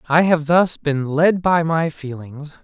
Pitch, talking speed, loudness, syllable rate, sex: 155 Hz, 180 wpm, -17 LUFS, 3.7 syllables/s, male